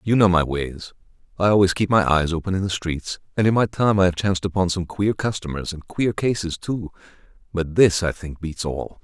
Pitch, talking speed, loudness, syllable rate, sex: 90 Hz, 225 wpm, -21 LUFS, 5.3 syllables/s, male